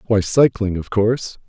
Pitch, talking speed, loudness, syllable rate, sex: 105 Hz, 160 wpm, -18 LUFS, 4.9 syllables/s, male